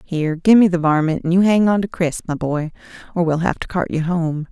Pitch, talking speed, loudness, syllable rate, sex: 170 Hz, 265 wpm, -18 LUFS, 5.7 syllables/s, female